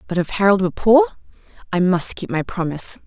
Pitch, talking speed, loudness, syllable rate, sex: 195 Hz, 195 wpm, -18 LUFS, 6.1 syllables/s, female